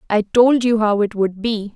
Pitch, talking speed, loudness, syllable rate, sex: 215 Hz, 240 wpm, -17 LUFS, 4.5 syllables/s, female